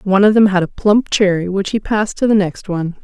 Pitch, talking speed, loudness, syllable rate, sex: 195 Hz, 275 wpm, -15 LUFS, 6.2 syllables/s, female